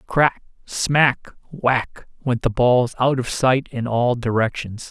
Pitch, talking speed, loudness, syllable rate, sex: 125 Hz, 120 wpm, -20 LUFS, 3.4 syllables/s, male